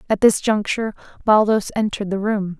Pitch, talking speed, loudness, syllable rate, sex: 210 Hz, 160 wpm, -19 LUFS, 5.8 syllables/s, female